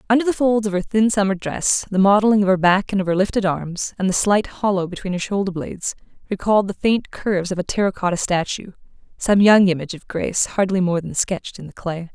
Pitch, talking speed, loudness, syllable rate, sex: 190 Hz, 230 wpm, -19 LUFS, 6.2 syllables/s, female